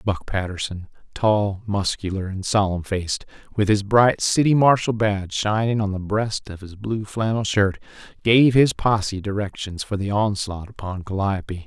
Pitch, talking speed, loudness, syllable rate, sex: 105 Hz, 160 wpm, -21 LUFS, 4.7 syllables/s, male